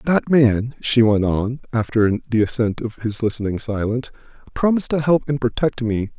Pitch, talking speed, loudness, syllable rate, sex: 120 Hz, 175 wpm, -19 LUFS, 5.2 syllables/s, male